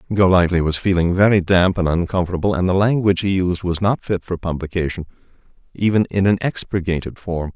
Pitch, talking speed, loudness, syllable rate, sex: 90 Hz, 175 wpm, -18 LUFS, 6.0 syllables/s, male